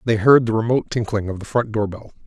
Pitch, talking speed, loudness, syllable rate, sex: 110 Hz, 265 wpm, -19 LUFS, 6.4 syllables/s, male